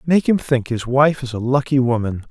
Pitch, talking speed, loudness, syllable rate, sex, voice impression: 130 Hz, 235 wpm, -18 LUFS, 5.1 syllables/s, male, masculine, middle-aged, relaxed, powerful, soft, muffled, slightly raspy, mature, wild, slightly lively, strict